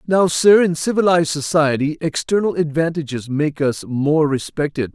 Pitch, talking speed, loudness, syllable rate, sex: 155 Hz, 135 wpm, -18 LUFS, 4.8 syllables/s, male